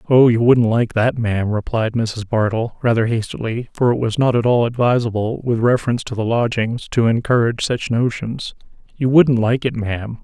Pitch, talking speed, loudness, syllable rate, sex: 115 Hz, 190 wpm, -18 LUFS, 5.3 syllables/s, male